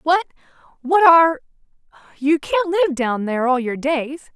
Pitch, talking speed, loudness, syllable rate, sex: 290 Hz, 125 wpm, -18 LUFS, 4.4 syllables/s, female